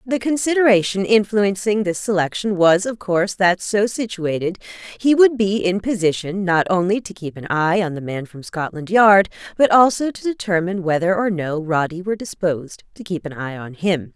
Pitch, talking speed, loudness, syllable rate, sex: 190 Hz, 180 wpm, -19 LUFS, 5.1 syllables/s, female